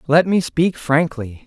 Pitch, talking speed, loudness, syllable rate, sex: 155 Hz, 165 wpm, -18 LUFS, 3.8 syllables/s, male